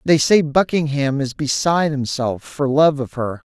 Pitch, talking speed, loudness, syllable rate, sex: 145 Hz, 170 wpm, -18 LUFS, 4.5 syllables/s, male